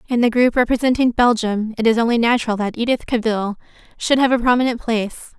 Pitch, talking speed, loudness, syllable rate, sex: 235 Hz, 190 wpm, -18 LUFS, 6.4 syllables/s, female